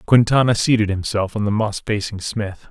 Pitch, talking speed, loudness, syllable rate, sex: 105 Hz, 175 wpm, -19 LUFS, 5.1 syllables/s, male